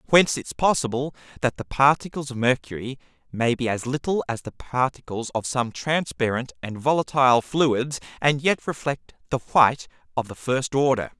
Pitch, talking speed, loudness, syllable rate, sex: 130 Hz, 160 wpm, -23 LUFS, 5.1 syllables/s, male